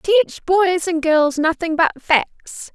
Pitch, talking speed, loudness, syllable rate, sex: 325 Hz, 155 wpm, -17 LUFS, 3.5 syllables/s, female